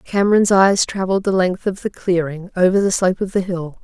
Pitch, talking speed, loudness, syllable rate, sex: 190 Hz, 220 wpm, -17 LUFS, 5.8 syllables/s, female